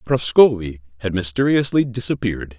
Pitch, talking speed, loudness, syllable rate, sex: 110 Hz, 95 wpm, -18 LUFS, 5.3 syllables/s, male